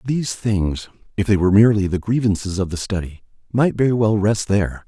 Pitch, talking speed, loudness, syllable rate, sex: 105 Hz, 195 wpm, -19 LUFS, 6.0 syllables/s, male